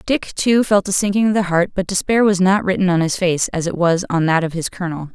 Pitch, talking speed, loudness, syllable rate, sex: 185 Hz, 280 wpm, -17 LUFS, 5.9 syllables/s, female